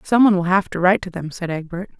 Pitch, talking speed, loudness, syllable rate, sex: 185 Hz, 300 wpm, -19 LUFS, 7.2 syllables/s, female